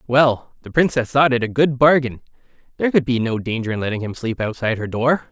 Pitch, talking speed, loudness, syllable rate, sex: 125 Hz, 225 wpm, -19 LUFS, 6.0 syllables/s, male